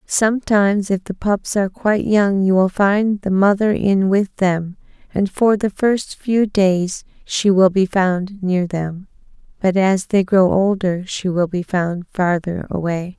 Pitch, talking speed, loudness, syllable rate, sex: 190 Hz, 175 wpm, -17 LUFS, 3.9 syllables/s, female